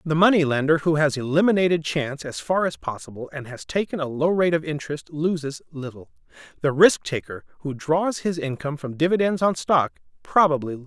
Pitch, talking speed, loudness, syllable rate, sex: 155 Hz, 195 wpm, -22 LUFS, 5.8 syllables/s, male